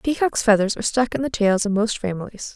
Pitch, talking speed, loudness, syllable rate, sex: 220 Hz, 235 wpm, -20 LUFS, 6.0 syllables/s, female